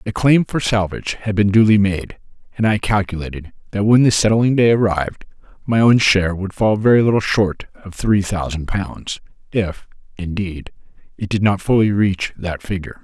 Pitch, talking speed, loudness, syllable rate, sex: 100 Hz, 175 wpm, -17 LUFS, 5.1 syllables/s, male